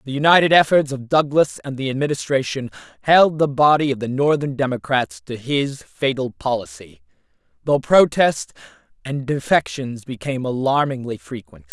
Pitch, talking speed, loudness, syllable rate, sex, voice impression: 135 Hz, 135 wpm, -19 LUFS, 5.0 syllables/s, male, very masculine, very adult-like, middle-aged, slightly thick, very tensed, powerful, bright, very hard, very clear, fluent, slightly cool, very intellectual, slightly refreshing, very sincere, calm, mature, slightly friendly, slightly reassuring, unique, slightly elegant, wild, very lively, strict, intense